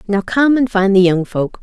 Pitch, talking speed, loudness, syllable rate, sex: 210 Hz, 260 wpm, -14 LUFS, 4.7 syllables/s, female